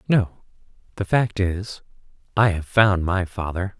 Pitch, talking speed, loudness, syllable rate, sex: 95 Hz, 140 wpm, -22 LUFS, 3.9 syllables/s, male